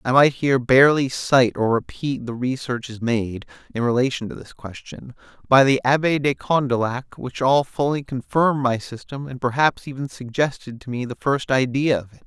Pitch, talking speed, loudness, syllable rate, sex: 130 Hz, 180 wpm, -21 LUFS, 5.0 syllables/s, male